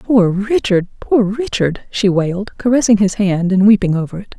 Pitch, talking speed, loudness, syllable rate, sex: 205 Hz, 180 wpm, -15 LUFS, 5.1 syllables/s, female